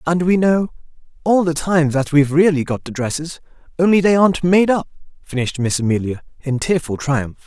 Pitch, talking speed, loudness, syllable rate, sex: 160 Hz, 185 wpm, -17 LUFS, 5.6 syllables/s, male